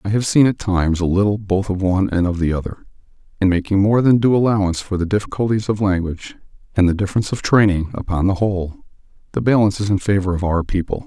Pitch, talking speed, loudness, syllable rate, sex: 100 Hz, 220 wpm, -18 LUFS, 6.9 syllables/s, male